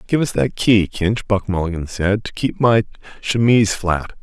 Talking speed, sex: 185 wpm, male